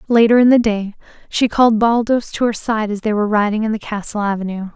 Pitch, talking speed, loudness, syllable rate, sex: 215 Hz, 225 wpm, -16 LUFS, 6.1 syllables/s, female